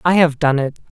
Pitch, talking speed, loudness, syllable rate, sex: 155 Hz, 240 wpm, -17 LUFS, 5.6 syllables/s, male